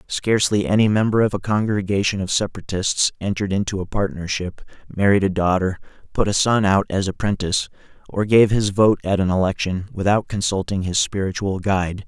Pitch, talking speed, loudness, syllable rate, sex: 100 Hz, 165 wpm, -20 LUFS, 5.7 syllables/s, male